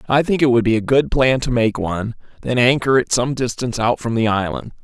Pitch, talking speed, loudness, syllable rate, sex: 120 Hz, 250 wpm, -18 LUFS, 5.9 syllables/s, male